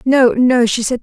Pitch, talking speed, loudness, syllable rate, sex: 245 Hz, 235 wpm, -13 LUFS, 4.3 syllables/s, female